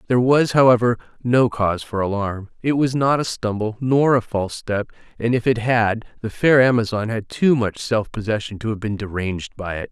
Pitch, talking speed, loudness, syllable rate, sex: 115 Hz, 205 wpm, -20 LUFS, 5.3 syllables/s, male